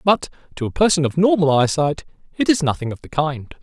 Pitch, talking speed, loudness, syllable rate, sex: 160 Hz, 215 wpm, -19 LUFS, 5.7 syllables/s, male